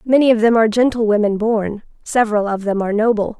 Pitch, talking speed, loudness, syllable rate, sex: 220 Hz, 195 wpm, -16 LUFS, 6.5 syllables/s, female